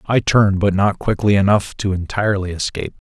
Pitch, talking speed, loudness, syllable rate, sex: 100 Hz, 175 wpm, -17 LUFS, 5.9 syllables/s, male